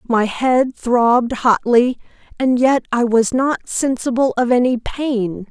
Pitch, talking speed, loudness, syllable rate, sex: 245 Hz, 130 wpm, -17 LUFS, 3.8 syllables/s, female